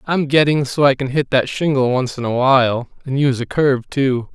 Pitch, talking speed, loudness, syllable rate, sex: 135 Hz, 235 wpm, -17 LUFS, 5.5 syllables/s, male